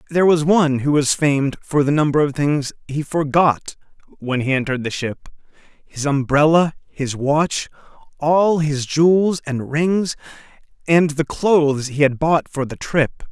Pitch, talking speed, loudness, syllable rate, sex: 150 Hz, 160 wpm, -18 LUFS, 4.5 syllables/s, male